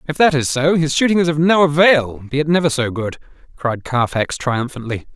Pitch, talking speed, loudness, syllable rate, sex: 145 Hz, 210 wpm, -17 LUFS, 5.4 syllables/s, male